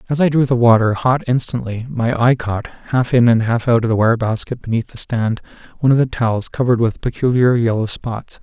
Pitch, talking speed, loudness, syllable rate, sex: 120 Hz, 220 wpm, -17 LUFS, 5.5 syllables/s, male